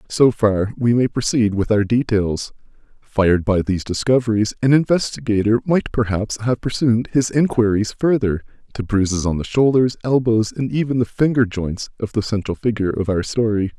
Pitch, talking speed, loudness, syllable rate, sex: 115 Hz, 165 wpm, -19 LUFS, 5.2 syllables/s, male